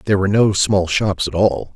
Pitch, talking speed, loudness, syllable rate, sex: 95 Hz, 240 wpm, -16 LUFS, 5.7 syllables/s, male